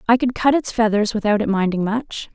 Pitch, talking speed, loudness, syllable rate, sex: 220 Hz, 230 wpm, -19 LUFS, 5.6 syllables/s, female